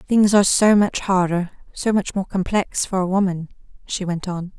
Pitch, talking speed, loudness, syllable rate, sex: 190 Hz, 195 wpm, -20 LUFS, 4.8 syllables/s, female